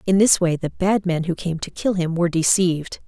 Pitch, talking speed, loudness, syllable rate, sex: 175 Hz, 255 wpm, -20 LUFS, 5.5 syllables/s, female